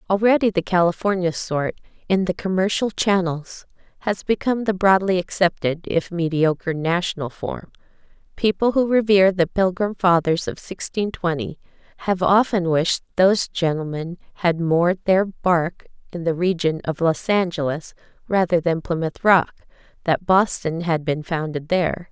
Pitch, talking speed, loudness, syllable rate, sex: 180 Hz, 140 wpm, -21 LUFS, 4.7 syllables/s, female